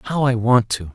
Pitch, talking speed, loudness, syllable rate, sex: 120 Hz, 255 wpm, -18 LUFS, 4.4 syllables/s, male